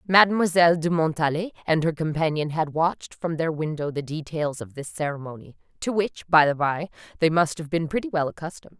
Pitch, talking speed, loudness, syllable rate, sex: 160 Hz, 190 wpm, -24 LUFS, 5.8 syllables/s, female